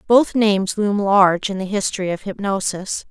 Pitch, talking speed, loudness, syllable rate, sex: 200 Hz, 175 wpm, -19 LUFS, 5.1 syllables/s, female